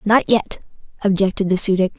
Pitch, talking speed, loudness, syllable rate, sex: 195 Hz, 180 wpm, -18 LUFS, 5.6 syllables/s, female